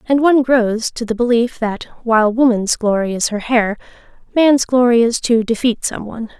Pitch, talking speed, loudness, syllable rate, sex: 235 Hz, 190 wpm, -15 LUFS, 5.1 syllables/s, female